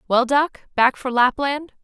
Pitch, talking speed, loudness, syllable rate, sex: 265 Hz, 165 wpm, -19 LUFS, 4.1 syllables/s, female